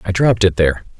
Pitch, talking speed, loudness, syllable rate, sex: 95 Hz, 240 wpm, -15 LUFS, 7.7 syllables/s, male